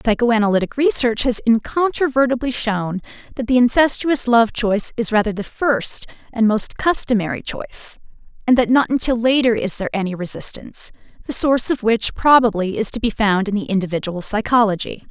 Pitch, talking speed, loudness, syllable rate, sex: 230 Hz, 160 wpm, -18 LUFS, 5.5 syllables/s, female